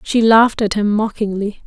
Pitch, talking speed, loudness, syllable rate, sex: 215 Hz, 180 wpm, -15 LUFS, 5.3 syllables/s, female